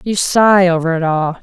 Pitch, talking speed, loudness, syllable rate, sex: 180 Hz, 210 wpm, -13 LUFS, 4.6 syllables/s, female